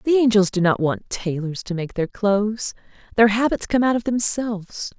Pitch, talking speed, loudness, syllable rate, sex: 210 Hz, 195 wpm, -21 LUFS, 5.0 syllables/s, female